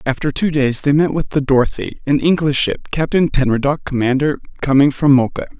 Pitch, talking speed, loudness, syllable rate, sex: 140 Hz, 180 wpm, -16 LUFS, 5.5 syllables/s, male